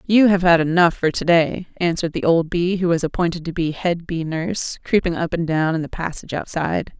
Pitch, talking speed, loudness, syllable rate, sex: 170 Hz, 230 wpm, -20 LUFS, 5.7 syllables/s, female